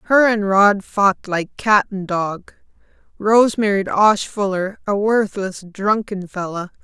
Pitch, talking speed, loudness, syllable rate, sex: 200 Hz, 140 wpm, -18 LUFS, 3.7 syllables/s, female